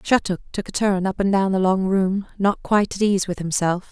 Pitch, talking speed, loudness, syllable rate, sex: 190 Hz, 245 wpm, -21 LUFS, 5.3 syllables/s, female